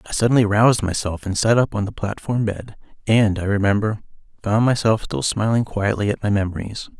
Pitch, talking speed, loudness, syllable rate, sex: 105 Hz, 190 wpm, -20 LUFS, 5.6 syllables/s, male